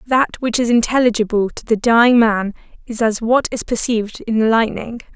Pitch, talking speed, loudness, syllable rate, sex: 230 Hz, 185 wpm, -16 LUFS, 5.2 syllables/s, female